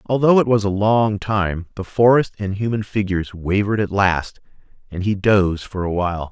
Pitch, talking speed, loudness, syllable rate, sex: 100 Hz, 190 wpm, -19 LUFS, 5.2 syllables/s, male